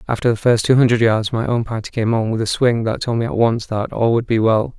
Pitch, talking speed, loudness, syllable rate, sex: 115 Hz, 300 wpm, -17 LUFS, 5.8 syllables/s, male